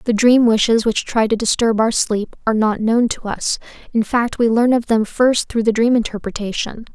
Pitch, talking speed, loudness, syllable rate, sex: 225 Hz, 215 wpm, -17 LUFS, 5.1 syllables/s, female